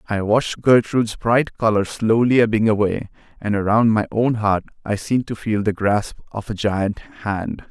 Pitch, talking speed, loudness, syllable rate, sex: 110 Hz, 180 wpm, -19 LUFS, 4.6 syllables/s, male